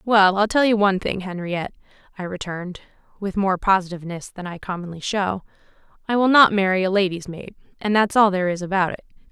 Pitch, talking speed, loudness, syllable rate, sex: 190 Hz, 195 wpm, -21 LUFS, 6.2 syllables/s, female